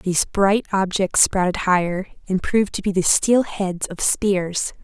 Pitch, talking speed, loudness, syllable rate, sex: 190 Hz, 175 wpm, -20 LUFS, 4.3 syllables/s, female